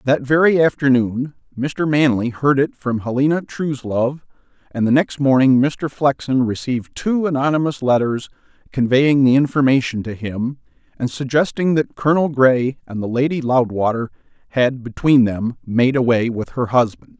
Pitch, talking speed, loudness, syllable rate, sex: 130 Hz, 145 wpm, -18 LUFS, 4.8 syllables/s, male